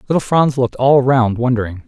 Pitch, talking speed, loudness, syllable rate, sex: 125 Hz, 190 wpm, -15 LUFS, 6.0 syllables/s, male